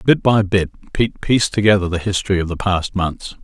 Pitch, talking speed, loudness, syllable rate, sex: 95 Hz, 210 wpm, -18 LUFS, 5.9 syllables/s, male